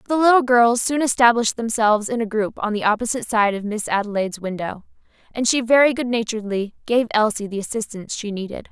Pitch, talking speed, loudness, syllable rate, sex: 225 Hz, 195 wpm, -20 LUFS, 6.3 syllables/s, female